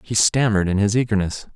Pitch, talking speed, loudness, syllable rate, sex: 105 Hz, 195 wpm, -19 LUFS, 6.4 syllables/s, male